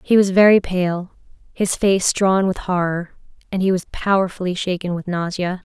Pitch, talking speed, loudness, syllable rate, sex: 185 Hz, 170 wpm, -19 LUFS, 4.8 syllables/s, female